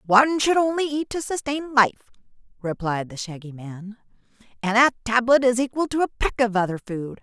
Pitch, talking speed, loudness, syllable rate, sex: 235 Hz, 185 wpm, -22 LUFS, 5.3 syllables/s, female